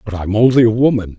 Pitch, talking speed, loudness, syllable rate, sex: 110 Hz, 255 wpm, -13 LUFS, 6.4 syllables/s, male